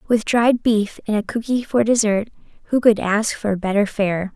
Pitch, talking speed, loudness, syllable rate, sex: 215 Hz, 195 wpm, -19 LUFS, 4.6 syllables/s, female